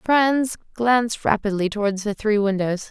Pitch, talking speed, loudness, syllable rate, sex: 215 Hz, 145 wpm, -21 LUFS, 4.6 syllables/s, female